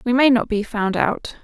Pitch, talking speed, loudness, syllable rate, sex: 225 Hz, 250 wpm, -19 LUFS, 4.6 syllables/s, female